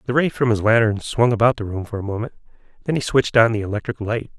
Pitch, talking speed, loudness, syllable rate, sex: 115 Hz, 260 wpm, -20 LUFS, 6.9 syllables/s, male